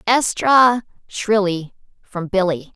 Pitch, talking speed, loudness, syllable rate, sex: 200 Hz, 85 wpm, -17 LUFS, 3.4 syllables/s, female